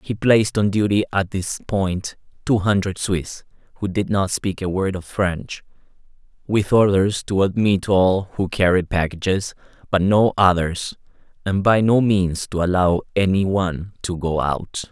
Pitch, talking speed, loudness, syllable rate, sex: 95 Hz, 160 wpm, -20 LUFS, 4.3 syllables/s, male